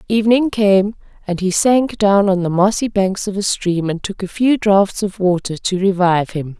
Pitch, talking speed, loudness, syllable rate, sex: 195 Hz, 210 wpm, -16 LUFS, 4.7 syllables/s, female